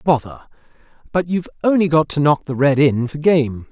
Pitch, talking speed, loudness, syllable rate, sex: 150 Hz, 195 wpm, -17 LUFS, 5.5 syllables/s, male